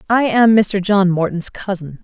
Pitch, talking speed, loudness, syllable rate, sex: 195 Hz, 175 wpm, -15 LUFS, 4.3 syllables/s, female